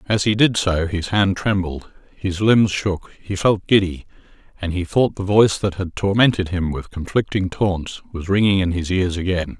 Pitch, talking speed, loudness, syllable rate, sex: 95 Hz, 195 wpm, -19 LUFS, 4.7 syllables/s, male